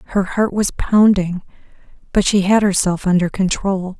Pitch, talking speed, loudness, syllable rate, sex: 195 Hz, 150 wpm, -16 LUFS, 4.3 syllables/s, female